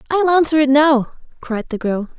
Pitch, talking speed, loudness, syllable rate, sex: 280 Hz, 190 wpm, -16 LUFS, 4.8 syllables/s, female